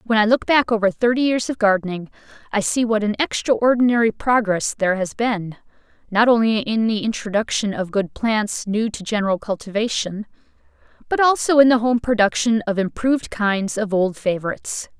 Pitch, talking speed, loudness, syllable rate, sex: 220 Hz, 170 wpm, -19 LUFS, 5.3 syllables/s, female